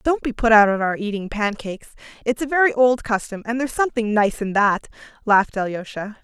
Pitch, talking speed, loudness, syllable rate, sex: 225 Hz, 195 wpm, -20 LUFS, 6.0 syllables/s, female